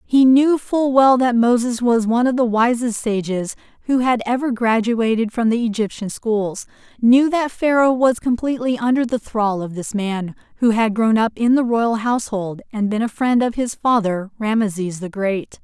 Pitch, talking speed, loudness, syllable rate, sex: 230 Hz, 190 wpm, -18 LUFS, 4.7 syllables/s, female